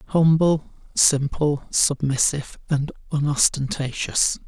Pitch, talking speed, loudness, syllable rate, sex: 145 Hz, 65 wpm, -21 LUFS, 3.8 syllables/s, male